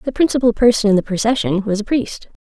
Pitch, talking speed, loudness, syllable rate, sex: 225 Hz, 225 wpm, -16 LUFS, 6.4 syllables/s, female